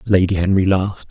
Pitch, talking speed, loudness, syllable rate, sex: 95 Hz, 160 wpm, -17 LUFS, 6.0 syllables/s, male